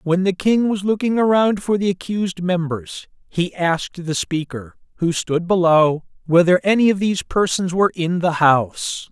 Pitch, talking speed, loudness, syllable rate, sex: 180 Hz, 170 wpm, -18 LUFS, 4.8 syllables/s, male